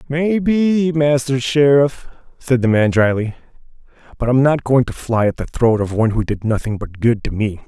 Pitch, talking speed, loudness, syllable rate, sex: 130 Hz, 205 wpm, -17 LUFS, 4.9 syllables/s, male